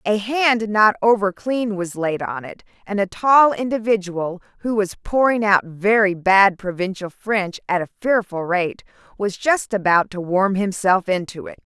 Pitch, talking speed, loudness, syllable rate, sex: 200 Hz, 170 wpm, -19 LUFS, 4.3 syllables/s, female